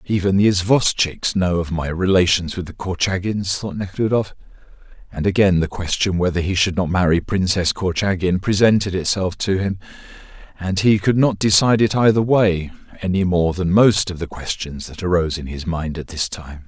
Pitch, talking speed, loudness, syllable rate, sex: 90 Hz, 180 wpm, -19 LUFS, 5.2 syllables/s, male